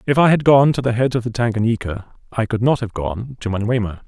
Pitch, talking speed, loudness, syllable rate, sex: 115 Hz, 250 wpm, -18 LUFS, 6.0 syllables/s, male